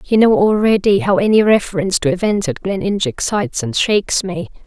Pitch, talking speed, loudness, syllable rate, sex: 190 Hz, 180 wpm, -15 LUFS, 5.7 syllables/s, female